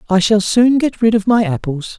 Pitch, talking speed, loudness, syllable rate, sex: 210 Hz, 240 wpm, -14 LUFS, 5.0 syllables/s, male